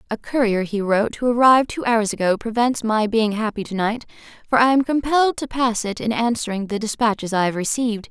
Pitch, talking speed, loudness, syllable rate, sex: 225 Hz, 215 wpm, -20 LUFS, 5.9 syllables/s, female